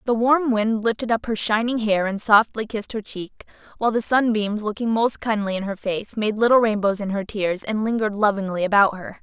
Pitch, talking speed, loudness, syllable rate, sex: 215 Hz, 215 wpm, -21 LUFS, 5.5 syllables/s, female